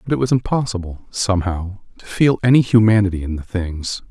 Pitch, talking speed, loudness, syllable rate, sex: 105 Hz, 175 wpm, -18 LUFS, 5.7 syllables/s, male